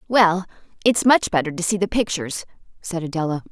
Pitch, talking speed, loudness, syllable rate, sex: 185 Hz, 170 wpm, -21 LUFS, 5.9 syllables/s, female